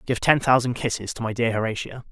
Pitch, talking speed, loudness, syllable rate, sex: 120 Hz, 225 wpm, -23 LUFS, 6.1 syllables/s, male